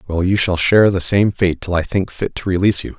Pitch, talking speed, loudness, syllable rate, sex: 95 Hz, 280 wpm, -16 LUFS, 6.0 syllables/s, male